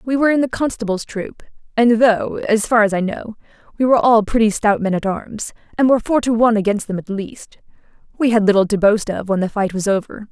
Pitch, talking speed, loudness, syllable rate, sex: 220 Hz, 240 wpm, -17 LUFS, 5.9 syllables/s, female